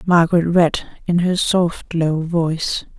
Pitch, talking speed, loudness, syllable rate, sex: 170 Hz, 140 wpm, -18 LUFS, 3.8 syllables/s, female